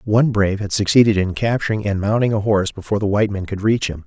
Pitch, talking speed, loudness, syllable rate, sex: 105 Hz, 250 wpm, -18 LUFS, 7.1 syllables/s, male